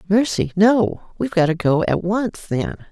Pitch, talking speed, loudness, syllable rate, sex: 195 Hz, 185 wpm, -19 LUFS, 4.3 syllables/s, female